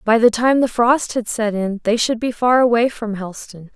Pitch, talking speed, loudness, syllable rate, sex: 230 Hz, 240 wpm, -17 LUFS, 5.0 syllables/s, female